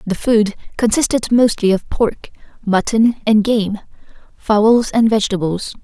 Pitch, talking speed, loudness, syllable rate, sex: 215 Hz, 125 wpm, -15 LUFS, 4.2 syllables/s, female